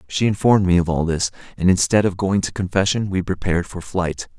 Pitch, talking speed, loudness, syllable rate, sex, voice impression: 90 Hz, 220 wpm, -19 LUFS, 5.9 syllables/s, male, masculine, adult-like, slightly relaxed, slightly dark, slightly hard, slightly muffled, raspy, intellectual, calm, wild, slightly sharp, slightly modest